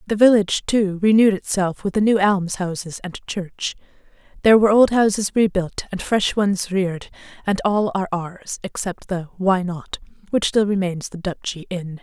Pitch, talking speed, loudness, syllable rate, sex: 195 Hz, 170 wpm, -20 LUFS, 5.0 syllables/s, female